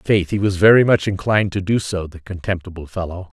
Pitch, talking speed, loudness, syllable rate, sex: 95 Hz, 215 wpm, -18 LUFS, 5.8 syllables/s, male